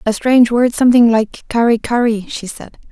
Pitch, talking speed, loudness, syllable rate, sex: 230 Hz, 185 wpm, -13 LUFS, 5.3 syllables/s, female